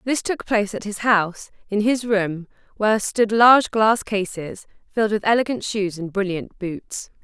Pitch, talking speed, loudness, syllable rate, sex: 210 Hz, 175 wpm, -20 LUFS, 4.7 syllables/s, female